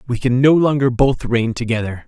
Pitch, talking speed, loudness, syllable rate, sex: 125 Hz, 205 wpm, -16 LUFS, 5.2 syllables/s, male